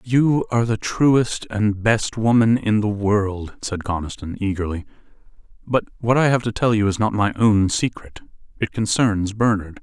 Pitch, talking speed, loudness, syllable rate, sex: 105 Hz, 170 wpm, -20 LUFS, 4.5 syllables/s, male